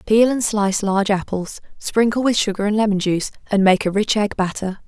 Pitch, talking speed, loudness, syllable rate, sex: 205 Hz, 210 wpm, -19 LUFS, 5.7 syllables/s, female